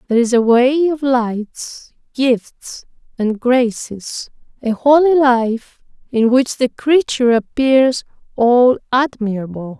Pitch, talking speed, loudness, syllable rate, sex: 245 Hz, 115 wpm, -15 LUFS, 3.5 syllables/s, female